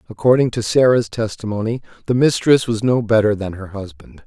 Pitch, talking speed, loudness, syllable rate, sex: 110 Hz, 170 wpm, -17 LUFS, 5.5 syllables/s, male